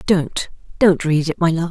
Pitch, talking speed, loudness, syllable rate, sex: 165 Hz, 175 wpm, -18 LUFS, 4.7 syllables/s, female